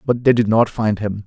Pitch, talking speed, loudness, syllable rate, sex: 110 Hz, 285 wpm, -17 LUFS, 5.1 syllables/s, male